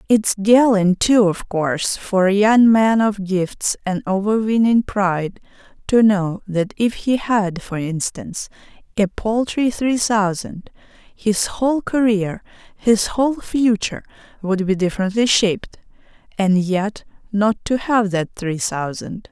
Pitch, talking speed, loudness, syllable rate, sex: 205 Hz, 135 wpm, -18 LUFS, 4.0 syllables/s, female